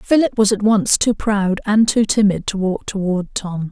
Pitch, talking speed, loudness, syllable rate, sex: 205 Hz, 210 wpm, -17 LUFS, 4.5 syllables/s, female